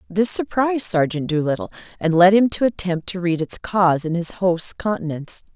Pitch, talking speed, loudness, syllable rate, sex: 185 Hz, 185 wpm, -19 LUFS, 5.4 syllables/s, female